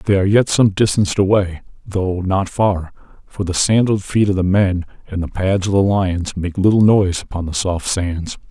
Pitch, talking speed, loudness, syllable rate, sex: 95 Hz, 205 wpm, -17 LUFS, 5.0 syllables/s, male